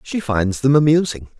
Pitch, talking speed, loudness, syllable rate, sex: 130 Hz, 170 wpm, -17 LUFS, 4.8 syllables/s, male